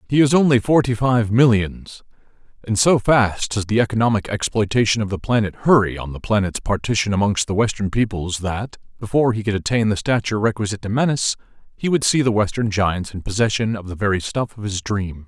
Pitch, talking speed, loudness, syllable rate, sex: 110 Hz, 195 wpm, -19 LUFS, 5.9 syllables/s, male